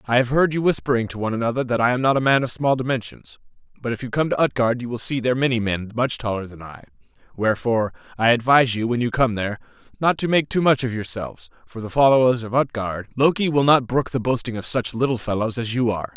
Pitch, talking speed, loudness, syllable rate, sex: 125 Hz, 245 wpm, -21 LUFS, 6.6 syllables/s, male